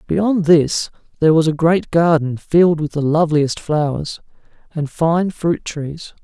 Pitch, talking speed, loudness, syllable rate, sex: 160 Hz, 155 wpm, -17 LUFS, 4.2 syllables/s, male